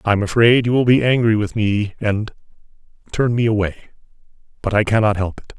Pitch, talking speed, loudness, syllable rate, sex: 110 Hz, 185 wpm, -17 LUFS, 5.8 syllables/s, male